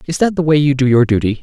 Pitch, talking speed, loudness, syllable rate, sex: 140 Hz, 335 wpm, -14 LUFS, 7.0 syllables/s, male